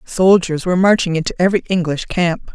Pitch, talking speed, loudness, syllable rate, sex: 175 Hz, 165 wpm, -16 LUFS, 5.9 syllables/s, female